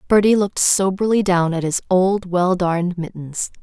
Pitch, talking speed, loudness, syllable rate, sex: 185 Hz, 165 wpm, -18 LUFS, 4.9 syllables/s, female